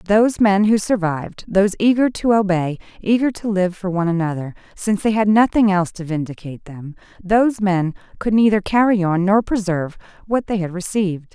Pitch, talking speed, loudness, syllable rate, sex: 195 Hz, 175 wpm, -18 LUFS, 5.7 syllables/s, female